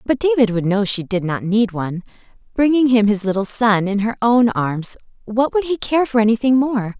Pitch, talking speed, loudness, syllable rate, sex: 225 Hz, 215 wpm, -17 LUFS, 5.2 syllables/s, female